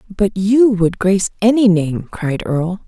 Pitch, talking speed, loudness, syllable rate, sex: 195 Hz, 165 wpm, -15 LUFS, 4.4 syllables/s, female